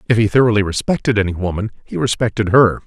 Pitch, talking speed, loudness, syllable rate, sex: 110 Hz, 190 wpm, -16 LUFS, 6.8 syllables/s, male